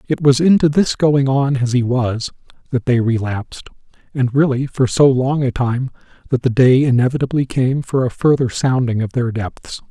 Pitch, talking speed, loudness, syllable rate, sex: 130 Hz, 190 wpm, -16 LUFS, 4.9 syllables/s, male